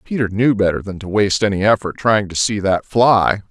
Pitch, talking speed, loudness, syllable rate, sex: 105 Hz, 225 wpm, -16 LUFS, 5.5 syllables/s, male